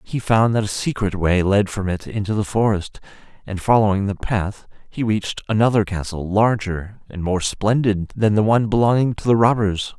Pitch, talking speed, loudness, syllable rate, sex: 105 Hz, 185 wpm, -19 LUFS, 5.1 syllables/s, male